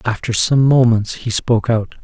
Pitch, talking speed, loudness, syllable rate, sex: 115 Hz, 175 wpm, -15 LUFS, 4.8 syllables/s, male